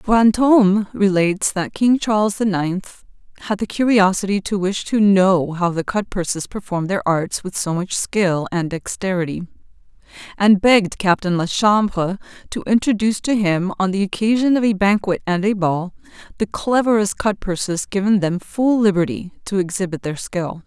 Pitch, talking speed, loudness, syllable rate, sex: 195 Hz, 165 wpm, -18 LUFS, 4.8 syllables/s, female